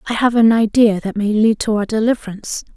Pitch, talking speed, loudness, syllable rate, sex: 220 Hz, 215 wpm, -16 LUFS, 6.1 syllables/s, female